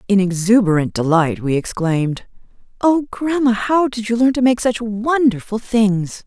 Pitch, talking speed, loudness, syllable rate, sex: 215 Hz, 155 wpm, -17 LUFS, 4.5 syllables/s, female